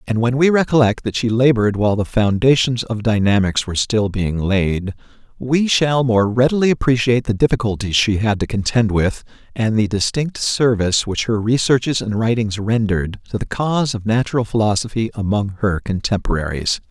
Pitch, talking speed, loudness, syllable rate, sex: 110 Hz, 165 wpm, -17 LUFS, 5.4 syllables/s, male